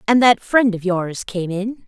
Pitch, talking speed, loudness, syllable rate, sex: 205 Hz, 225 wpm, -18 LUFS, 4.1 syllables/s, female